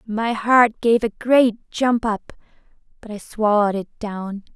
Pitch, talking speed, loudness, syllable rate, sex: 220 Hz, 160 wpm, -19 LUFS, 4.1 syllables/s, female